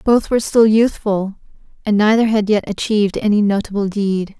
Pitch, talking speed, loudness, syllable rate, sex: 210 Hz, 165 wpm, -16 LUFS, 5.2 syllables/s, female